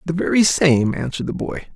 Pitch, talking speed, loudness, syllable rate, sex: 145 Hz, 205 wpm, -18 LUFS, 5.6 syllables/s, male